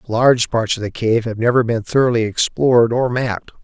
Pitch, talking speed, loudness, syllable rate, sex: 115 Hz, 200 wpm, -17 LUFS, 5.6 syllables/s, male